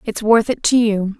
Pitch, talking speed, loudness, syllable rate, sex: 220 Hz, 250 wpm, -16 LUFS, 4.6 syllables/s, female